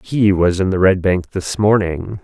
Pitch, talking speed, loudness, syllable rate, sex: 95 Hz, 215 wpm, -16 LUFS, 4.2 syllables/s, male